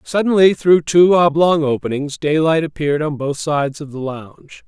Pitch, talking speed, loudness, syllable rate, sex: 155 Hz, 165 wpm, -16 LUFS, 5.0 syllables/s, male